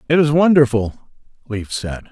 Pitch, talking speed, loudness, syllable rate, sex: 130 Hz, 140 wpm, -17 LUFS, 4.8 syllables/s, male